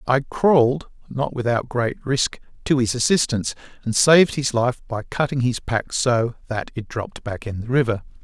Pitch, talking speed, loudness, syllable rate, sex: 125 Hz, 180 wpm, -21 LUFS, 5.2 syllables/s, male